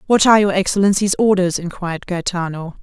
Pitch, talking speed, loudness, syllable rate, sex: 185 Hz, 150 wpm, -17 LUFS, 6.1 syllables/s, female